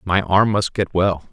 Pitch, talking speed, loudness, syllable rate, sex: 95 Hz, 225 wpm, -18 LUFS, 4.2 syllables/s, male